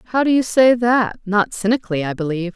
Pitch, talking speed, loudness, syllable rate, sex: 215 Hz, 190 wpm, -17 LUFS, 6.3 syllables/s, female